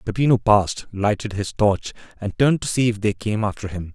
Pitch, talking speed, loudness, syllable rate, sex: 105 Hz, 215 wpm, -21 LUFS, 5.6 syllables/s, male